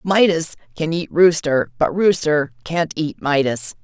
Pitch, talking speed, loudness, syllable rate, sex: 155 Hz, 140 wpm, -18 LUFS, 4.0 syllables/s, female